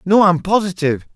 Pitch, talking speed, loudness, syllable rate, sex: 175 Hz, 210 wpm, -16 LUFS, 6.9 syllables/s, male